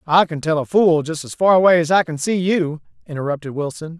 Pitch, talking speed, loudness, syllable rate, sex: 165 Hz, 240 wpm, -18 LUFS, 5.8 syllables/s, male